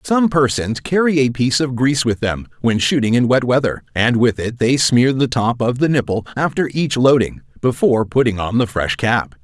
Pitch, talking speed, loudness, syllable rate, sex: 125 Hz, 210 wpm, -17 LUFS, 5.1 syllables/s, male